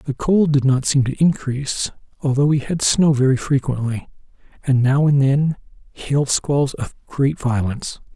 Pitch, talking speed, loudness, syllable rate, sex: 135 Hz, 160 wpm, -18 LUFS, 4.5 syllables/s, male